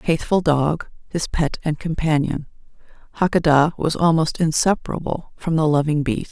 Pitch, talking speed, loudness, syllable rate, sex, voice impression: 160 Hz, 135 wpm, -20 LUFS, 4.9 syllables/s, female, very feminine, middle-aged, thin, tensed, slightly weak, slightly dark, soft, clear, fluent, slightly raspy, slightly cute, intellectual, refreshing, sincere, calm, very friendly, very reassuring, unique, elegant, slightly wild, sweet, slightly lively, kind, modest